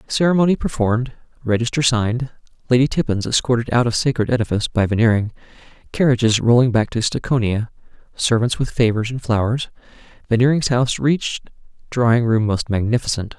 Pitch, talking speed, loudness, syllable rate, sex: 120 Hz, 135 wpm, -18 LUFS, 6.0 syllables/s, male